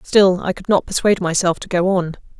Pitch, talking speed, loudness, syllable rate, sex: 185 Hz, 225 wpm, -17 LUFS, 5.8 syllables/s, female